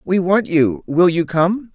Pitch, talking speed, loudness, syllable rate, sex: 175 Hz, 205 wpm, -16 LUFS, 3.7 syllables/s, male